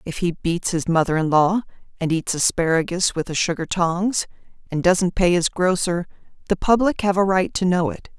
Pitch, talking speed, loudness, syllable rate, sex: 175 Hz, 200 wpm, -20 LUFS, 5.0 syllables/s, female